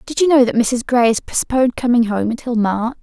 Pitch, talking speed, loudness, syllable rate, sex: 240 Hz, 240 wpm, -16 LUFS, 5.6 syllables/s, female